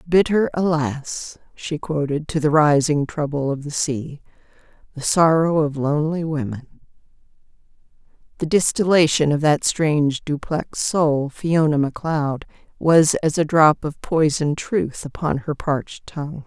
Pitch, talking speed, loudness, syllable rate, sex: 150 Hz, 130 wpm, -20 LUFS, 4.3 syllables/s, female